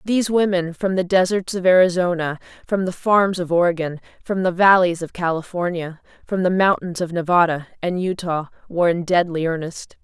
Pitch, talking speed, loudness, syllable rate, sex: 175 Hz, 165 wpm, -19 LUFS, 5.3 syllables/s, female